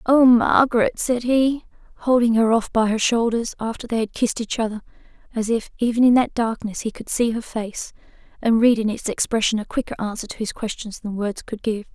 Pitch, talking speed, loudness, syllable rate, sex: 230 Hz, 210 wpm, -21 LUFS, 5.5 syllables/s, female